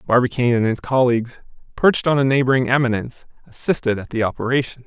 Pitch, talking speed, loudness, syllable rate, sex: 125 Hz, 160 wpm, -19 LUFS, 6.9 syllables/s, male